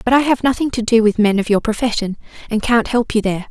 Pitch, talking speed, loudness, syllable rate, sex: 225 Hz, 275 wpm, -16 LUFS, 6.5 syllables/s, female